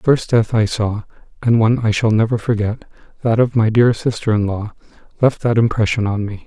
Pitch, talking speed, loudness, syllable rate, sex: 110 Hz, 195 wpm, -17 LUFS, 5.5 syllables/s, male